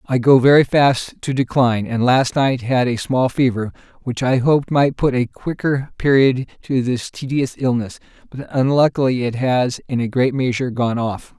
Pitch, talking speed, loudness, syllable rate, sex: 130 Hz, 185 wpm, -18 LUFS, 4.7 syllables/s, male